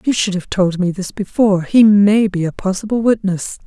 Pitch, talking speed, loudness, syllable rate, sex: 200 Hz, 215 wpm, -15 LUFS, 5.1 syllables/s, female